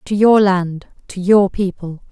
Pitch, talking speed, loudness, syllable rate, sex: 190 Hz, 140 wpm, -15 LUFS, 3.9 syllables/s, female